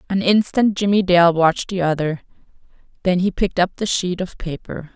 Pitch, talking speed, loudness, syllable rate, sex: 180 Hz, 180 wpm, -18 LUFS, 5.3 syllables/s, female